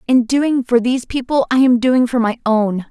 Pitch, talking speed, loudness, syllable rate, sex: 245 Hz, 225 wpm, -15 LUFS, 4.9 syllables/s, female